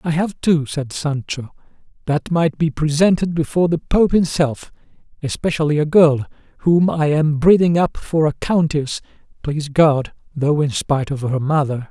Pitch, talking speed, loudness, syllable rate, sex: 155 Hz, 160 wpm, -18 LUFS, 4.7 syllables/s, male